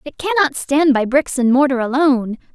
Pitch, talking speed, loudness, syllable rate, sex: 275 Hz, 190 wpm, -16 LUFS, 5.2 syllables/s, female